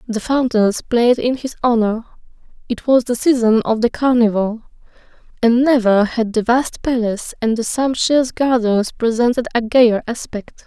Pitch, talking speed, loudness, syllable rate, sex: 235 Hz, 150 wpm, -16 LUFS, 4.6 syllables/s, female